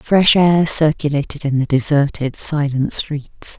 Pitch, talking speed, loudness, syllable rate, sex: 150 Hz, 135 wpm, -16 LUFS, 3.9 syllables/s, female